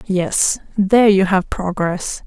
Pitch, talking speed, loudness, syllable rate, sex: 190 Hz, 130 wpm, -16 LUFS, 3.6 syllables/s, female